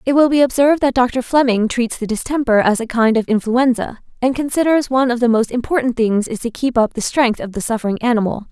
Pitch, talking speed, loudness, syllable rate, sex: 245 Hz, 230 wpm, -16 LUFS, 6.0 syllables/s, female